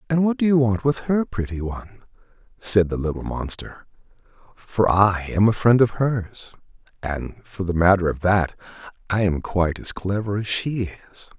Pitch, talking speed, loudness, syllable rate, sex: 105 Hz, 180 wpm, -21 LUFS, 5.0 syllables/s, male